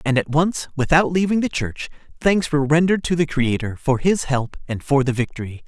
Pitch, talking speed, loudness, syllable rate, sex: 145 Hz, 210 wpm, -20 LUFS, 5.5 syllables/s, male